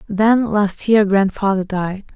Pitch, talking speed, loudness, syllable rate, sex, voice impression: 200 Hz, 140 wpm, -17 LUFS, 3.7 syllables/s, female, feminine, adult-like, slightly relaxed, slightly weak, muffled, slightly intellectual, calm, friendly, reassuring, elegant, kind, modest